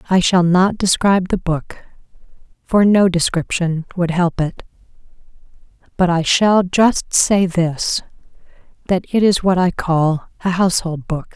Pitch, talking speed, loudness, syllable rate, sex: 180 Hz, 145 wpm, -16 LUFS, 4.2 syllables/s, female